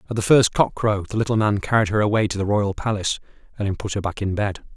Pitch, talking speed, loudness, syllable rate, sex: 105 Hz, 265 wpm, -21 LUFS, 6.5 syllables/s, male